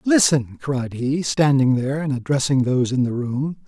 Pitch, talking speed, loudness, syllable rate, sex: 135 Hz, 180 wpm, -20 LUFS, 4.8 syllables/s, male